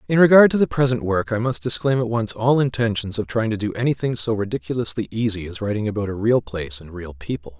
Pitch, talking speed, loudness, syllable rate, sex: 110 Hz, 235 wpm, -21 LUFS, 6.2 syllables/s, male